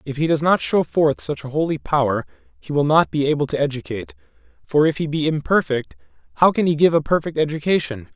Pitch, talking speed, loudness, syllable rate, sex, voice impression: 150 Hz, 215 wpm, -20 LUFS, 6.1 syllables/s, male, masculine, slightly young, slightly adult-like, slightly thick, tensed, slightly powerful, very bright, slightly soft, clear, slightly fluent, cool, intellectual, very refreshing, sincere, slightly calm, slightly mature, very friendly, reassuring, slightly unique, wild, slightly sweet, very lively, kind, slightly intense